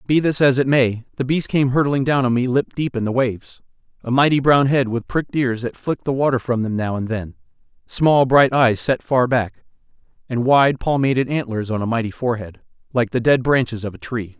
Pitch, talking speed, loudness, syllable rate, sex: 125 Hz, 225 wpm, -19 LUFS, 5.5 syllables/s, male